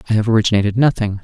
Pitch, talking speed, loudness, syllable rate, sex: 110 Hz, 195 wpm, -15 LUFS, 8.7 syllables/s, male